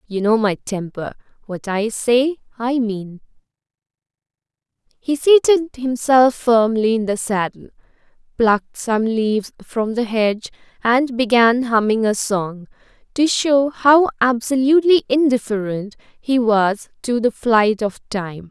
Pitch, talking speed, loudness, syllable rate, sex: 235 Hz, 125 wpm, -17 LUFS, 4.0 syllables/s, female